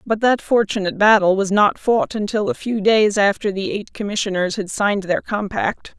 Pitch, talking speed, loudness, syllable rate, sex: 205 Hz, 190 wpm, -18 LUFS, 5.1 syllables/s, female